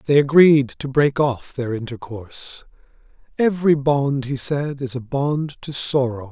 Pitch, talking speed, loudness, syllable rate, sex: 135 Hz, 150 wpm, -19 LUFS, 4.3 syllables/s, male